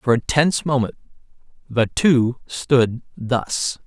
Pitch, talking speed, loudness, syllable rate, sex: 130 Hz, 125 wpm, -20 LUFS, 3.5 syllables/s, male